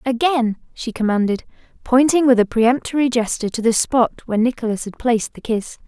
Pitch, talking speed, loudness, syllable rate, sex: 235 Hz, 175 wpm, -18 LUFS, 5.9 syllables/s, female